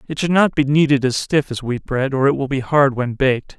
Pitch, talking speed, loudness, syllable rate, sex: 135 Hz, 285 wpm, -17 LUFS, 5.5 syllables/s, male